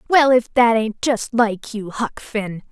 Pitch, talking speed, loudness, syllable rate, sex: 225 Hz, 200 wpm, -19 LUFS, 3.7 syllables/s, female